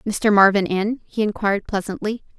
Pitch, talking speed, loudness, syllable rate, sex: 205 Hz, 150 wpm, -20 LUFS, 5.3 syllables/s, female